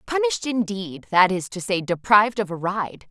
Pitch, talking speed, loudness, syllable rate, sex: 190 Hz, 175 wpm, -22 LUFS, 5.1 syllables/s, female